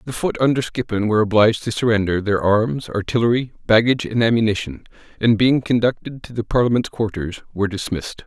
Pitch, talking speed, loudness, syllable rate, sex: 110 Hz, 165 wpm, -19 LUFS, 6.1 syllables/s, male